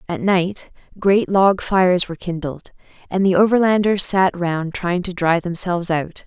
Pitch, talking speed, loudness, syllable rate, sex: 185 Hz, 165 wpm, -18 LUFS, 4.6 syllables/s, female